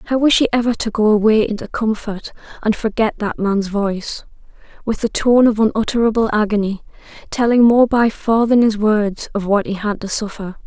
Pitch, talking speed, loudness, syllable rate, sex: 215 Hz, 185 wpm, -16 LUFS, 5.2 syllables/s, female